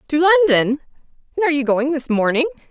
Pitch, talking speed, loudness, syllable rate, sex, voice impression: 295 Hz, 155 wpm, -17 LUFS, 6.4 syllables/s, female, feminine, adult-like, tensed, powerful, bright, soft, clear, fluent, intellectual, calm, friendly, reassuring, elegant, lively, slightly sharp